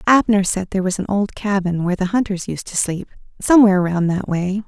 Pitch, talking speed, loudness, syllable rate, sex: 195 Hz, 220 wpm, -18 LUFS, 6.0 syllables/s, female